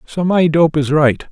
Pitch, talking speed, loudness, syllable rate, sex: 155 Hz, 230 wpm, -14 LUFS, 4.2 syllables/s, male